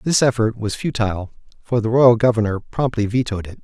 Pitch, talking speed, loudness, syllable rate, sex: 115 Hz, 180 wpm, -19 LUFS, 5.7 syllables/s, male